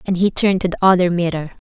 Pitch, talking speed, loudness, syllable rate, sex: 180 Hz, 255 wpm, -16 LUFS, 6.9 syllables/s, female